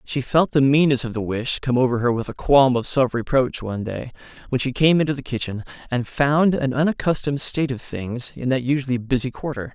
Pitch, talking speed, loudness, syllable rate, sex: 130 Hz, 220 wpm, -21 LUFS, 5.7 syllables/s, male